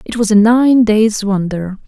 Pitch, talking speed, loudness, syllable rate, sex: 215 Hz, 190 wpm, -12 LUFS, 4.1 syllables/s, female